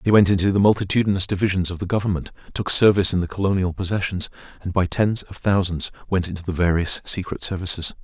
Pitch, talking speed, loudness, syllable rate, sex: 95 Hz, 195 wpm, -21 LUFS, 6.6 syllables/s, male